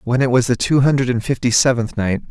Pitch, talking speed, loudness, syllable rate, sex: 120 Hz, 260 wpm, -16 LUFS, 6.1 syllables/s, male